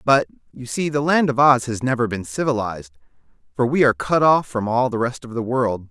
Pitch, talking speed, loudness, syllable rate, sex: 120 Hz, 235 wpm, -20 LUFS, 5.7 syllables/s, male